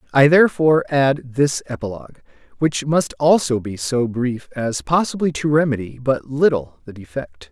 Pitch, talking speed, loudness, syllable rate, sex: 135 Hz, 150 wpm, -19 LUFS, 4.8 syllables/s, male